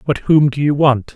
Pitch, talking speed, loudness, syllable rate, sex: 140 Hz, 260 wpm, -14 LUFS, 5.0 syllables/s, male